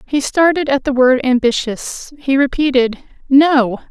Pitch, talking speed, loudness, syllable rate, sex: 270 Hz, 140 wpm, -14 LUFS, 4.1 syllables/s, female